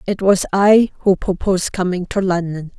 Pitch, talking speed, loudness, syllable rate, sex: 190 Hz, 170 wpm, -17 LUFS, 5.0 syllables/s, female